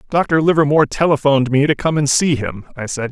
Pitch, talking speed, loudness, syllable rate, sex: 140 Hz, 210 wpm, -16 LUFS, 6.0 syllables/s, male